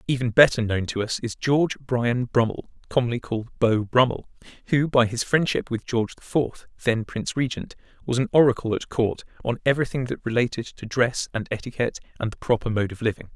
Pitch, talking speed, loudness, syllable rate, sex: 120 Hz, 185 wpm, -24 LUFS, 5.9 syllables/s, male